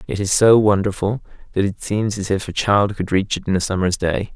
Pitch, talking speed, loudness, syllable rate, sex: 100 Hz, 250 wpm, -19 LUFS, 5.5 syllables/s, male